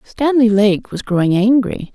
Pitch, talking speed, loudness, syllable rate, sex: 220 Hz, 155 wpm, -15 LUFS, 4.3 syllables/s, female